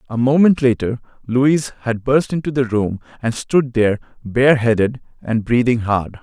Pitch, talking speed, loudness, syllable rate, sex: 120 Hz, 155 wpm, -17 LUFS, 4.9 syllables/s, male